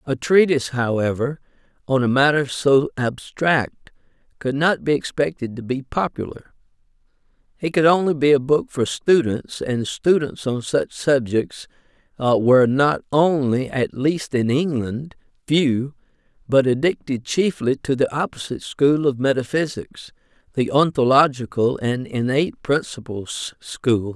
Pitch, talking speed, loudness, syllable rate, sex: 135 Hz, 125 wpm, -20 LUFS, 4.1 syllables/s, male